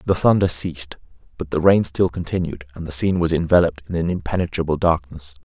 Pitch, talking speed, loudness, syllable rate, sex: 80 Hz, 185 wpm, -20 LUFS, 6.4 syllables/s, male